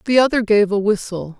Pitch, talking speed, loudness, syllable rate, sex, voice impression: 215 Hz, 215 wpm, -17 LUFS, 5.6 syllables/s, female, slightly masculine, slightly feminine, very gender-neutral, adult-like, slightly middle-aged, slightly thick, slightly tensed, weak, dark, slightly soft, muffled, slightly halting, slightly raspy, intellectual, very sincere, very calm, slightly friendly, reassuring, very unique, very elegant, slightly sweet, very kind, very modest